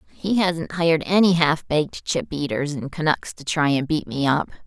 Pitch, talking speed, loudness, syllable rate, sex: 155 Hz, 205 wpm, -21 LUFS, 5.0 syllables/s, female